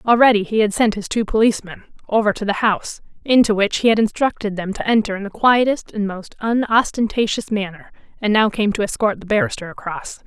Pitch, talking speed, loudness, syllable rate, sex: 210 Hz, 200 wpm, -18 LUFS, 5.9 syllables/s, female